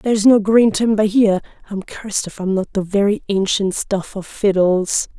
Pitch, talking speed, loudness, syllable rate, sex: 200 Hz, 185 wpm, -17 LUFS, 4.9 syllables/s, female